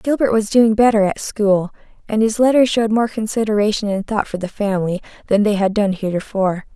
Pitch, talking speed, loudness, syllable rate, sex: 210 Hz, 195 wpm, -17 LUFS, 6.0 syllables/s, female